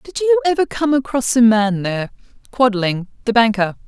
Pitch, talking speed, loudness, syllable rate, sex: 225 Hz, 170 wpm, -17 LUFS, 5.3 syllables/s, female